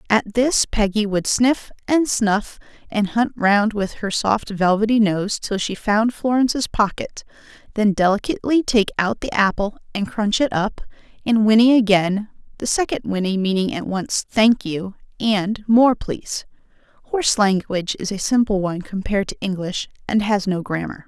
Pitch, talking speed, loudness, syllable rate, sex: 210 Hz, 160 wpm, -19 LUFS, 4.7 syllables/s, female